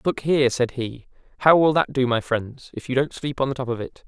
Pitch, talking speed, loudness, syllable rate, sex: 130 Hz, 265 wpm, -22 LUFS, 5.6 syllables/s, male